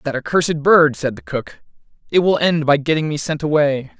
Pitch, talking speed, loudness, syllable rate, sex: 150 Hz, 210 wpm, -17 LUFS, 5.4 syllables/s, male